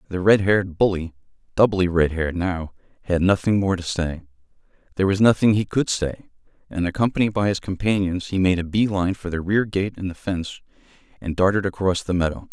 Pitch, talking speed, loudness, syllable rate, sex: 95 Hz, 195 wpm, -21 LUFS, 5.9 syllables/s, male